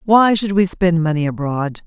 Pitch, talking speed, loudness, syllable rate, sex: 175 Hz, 195 wpm, -17 LUFS, 4.6 syllables/s, female